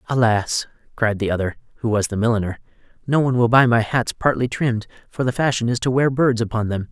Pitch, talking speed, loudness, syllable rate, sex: 115 Hz, 215 wpm, -20 LUFS, 6.1 syllables/s, male